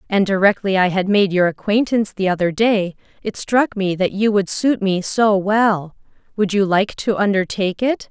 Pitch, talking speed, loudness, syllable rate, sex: 200 Hz, 190 wpm, -18 LUFS, 4.8 syllables/s, female